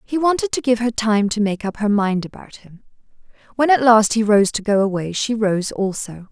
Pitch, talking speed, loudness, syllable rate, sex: 220 Hz, 230 wpm, -18 LUFS, 5.1 syllables/s, female